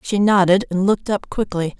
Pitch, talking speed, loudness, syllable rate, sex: 190 Hz, 200 wpm, -18 LUFS, 5.5 syllables/s, female